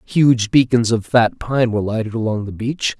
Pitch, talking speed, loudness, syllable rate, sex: 115 Hz, 200 wpm, -17 LUFS, 4.9 syllables/s, male